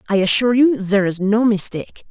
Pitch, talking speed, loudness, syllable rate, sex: 210 Hz, 200 wpm, -16 LUFS, 6.3 syllables/s, female